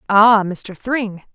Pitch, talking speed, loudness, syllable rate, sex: 210 Hz, 135 wpm, -16 LUFS, 2.9 syllables/s, female